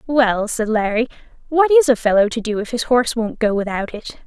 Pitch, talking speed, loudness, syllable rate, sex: 235 Hz, 225 wpm, -18 LUFS, 5.5 syllables/s, female